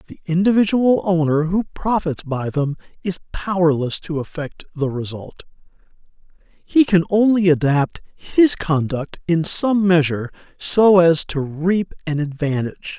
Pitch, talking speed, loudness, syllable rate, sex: 170 Hz, 130 wpm, -19 LUFS, 4.4 syllables/s, male